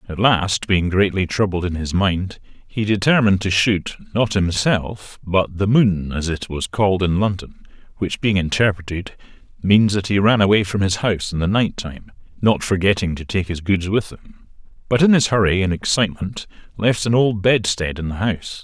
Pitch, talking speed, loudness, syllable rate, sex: 100 Hz, 190 wpm, -19 LUFS, 5.1 syllables/s, male